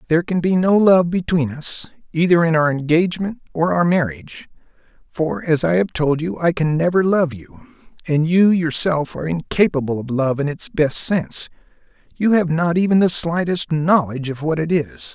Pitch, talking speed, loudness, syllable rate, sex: 160 Hz, 185 wpm, -18 LUFS, 5.1 syllables/s, male